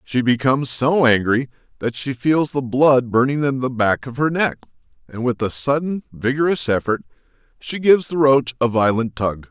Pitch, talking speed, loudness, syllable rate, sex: 130 Hz, 185 wpm, -19 LUFS, 5.0 syllables/s, male